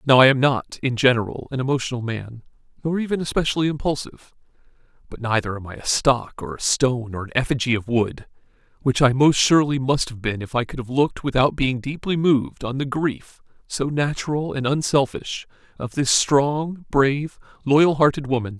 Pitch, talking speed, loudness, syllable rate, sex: 135 Hz, 185 wpm, -21 LUFS, 5.4 syllables/s, male